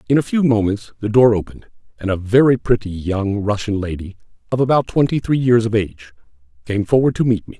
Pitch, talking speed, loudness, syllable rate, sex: 110 Hz, 205 wpm, -17 LUFS, 6.0 syllables/s, male